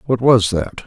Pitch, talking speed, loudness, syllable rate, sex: 110 Hz, 205 wpm, -15 LUFS, 3.9 syllables/s, male